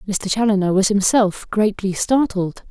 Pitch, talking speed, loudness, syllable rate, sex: 205 Hz, 135 wpm, -18 LUFS, 4.4 syllables/s, female